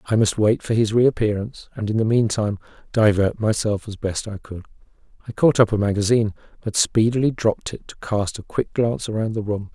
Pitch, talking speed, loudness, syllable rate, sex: 110 Hz, 205 wpm, -21 LUFS, 5.8 syllables/s, male